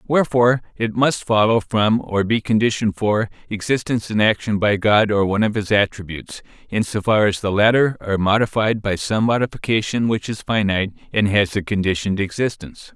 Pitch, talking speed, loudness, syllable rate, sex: 105 Hz, 175 wpm, -19 LUFS, 5.7 syllables/s, male